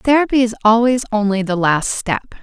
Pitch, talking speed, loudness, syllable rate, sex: 225 Hz, 175 wpm, -16 LUFS, 5.2 syllables/s, female